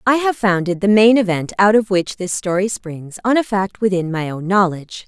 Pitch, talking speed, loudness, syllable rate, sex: 195 Hz, 225 wpm, -17 LUFS, 5.2 syllables/s, female